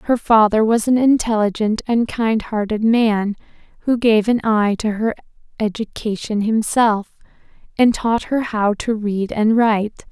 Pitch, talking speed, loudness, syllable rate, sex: 220 Hz, 150 wpm, -18 LUFS, 4.3 syllables/s, female